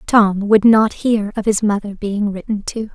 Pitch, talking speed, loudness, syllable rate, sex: 210 Hz, 205 wpm, -16 LUFS, 4.3 syllables/s, female